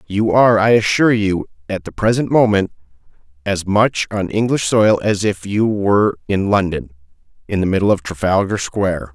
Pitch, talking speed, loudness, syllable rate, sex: 100 Hz, 170 wpm, -16 LUFS, 5.1 syllables/s, male